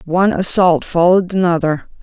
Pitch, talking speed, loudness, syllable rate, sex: 175 Hz, 120 wpm, -14 LUFS, 5.6 syllables/s, female